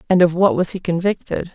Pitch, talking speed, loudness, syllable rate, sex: 175 Hz, 235 wpm, -18 LUFS, 5.8 syllables/s, female